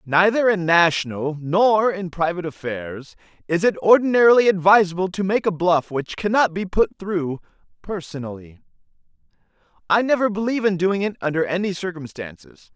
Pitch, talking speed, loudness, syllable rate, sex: 180 Hz, 135 wpm, -20 LUFS, 5.2 syllables/s, male